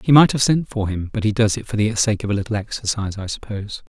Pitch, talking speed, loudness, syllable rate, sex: 105 Hz, 290 wpm, -20 LUFS, 6.7 syllables/s, male